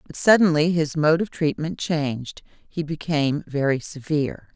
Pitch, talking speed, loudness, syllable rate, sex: 155 Hz, 145 wpm, -22 LUFS, 4.7 syllables/s, female